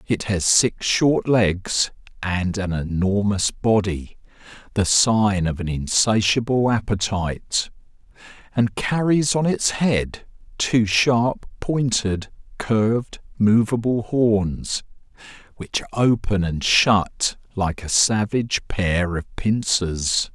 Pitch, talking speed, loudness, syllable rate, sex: 105 Hz, 100 wpm, -20 LUFS, 3.3 syllables/s, male